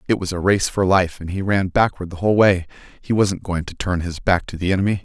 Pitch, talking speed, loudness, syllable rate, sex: 95 Hz, 275 wpm, -20 LUFS, 6.0 syllables/s, male